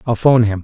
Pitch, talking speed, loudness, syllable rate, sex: 115 Hz, 285 wpm, -13 LUFS, 8.2 syllables/s, male